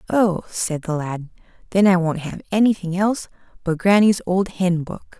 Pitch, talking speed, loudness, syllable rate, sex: 185 Hz, 175 wpm, -20 LUFS, 4.8 syllables/s, female